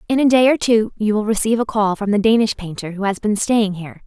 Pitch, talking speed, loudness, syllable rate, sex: 215 Hz, 280 wpm, -17 LUFS, 6.3 syllables/s, female